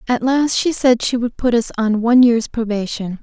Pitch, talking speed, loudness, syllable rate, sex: 235 Hz, 225 wpm, -16 LUFS, 5.0 syllables/s, female